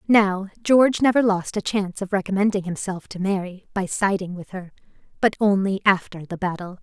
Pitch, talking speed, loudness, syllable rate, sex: 195 Hz, 165 wpm, -22 LUFS, 5.5 syllables/s, female